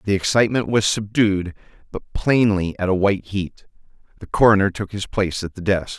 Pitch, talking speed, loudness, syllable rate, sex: 100 Hz, 180 wpm, -20 LUFS, 5.6 syllables/s, male